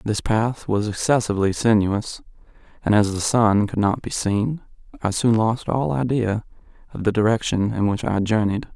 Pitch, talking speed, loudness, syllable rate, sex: 110 Hz, 170 wpm, -21 LUFS, 4.8 syllables/s, male